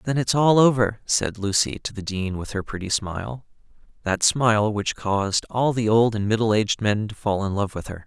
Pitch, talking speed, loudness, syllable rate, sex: 110 Hz, 215 wpm, -22 LUFS, 5.3 syllables/s, male